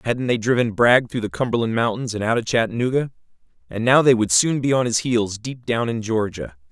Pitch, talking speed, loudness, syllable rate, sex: 115 Hz, 225 wpm, -20 LUFS, 5.6 syllables/s, male